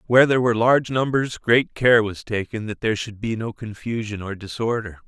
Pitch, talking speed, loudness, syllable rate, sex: 115 Hz, 200 wpm, -21 LUFS, 5.8 syllables/s, male